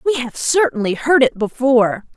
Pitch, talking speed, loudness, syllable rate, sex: 255 Hz, 165 wpm, -16 LUFS, 5.1 syllables/s, female